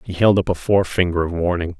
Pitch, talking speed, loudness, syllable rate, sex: 90 Hz, 235 wpm, -19 LUFS, 6.5 syllables/s, male